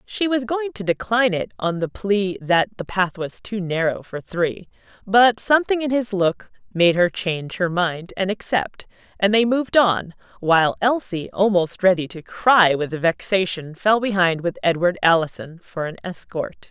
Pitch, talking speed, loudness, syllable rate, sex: 195 Hz, 175 wpm, -20 LUFS, 4.6 syllables/s, female